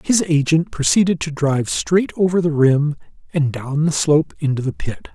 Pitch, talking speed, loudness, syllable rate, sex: 150 Hz, 185 wpm, -18 LUFS, 5.0 syllables/s, male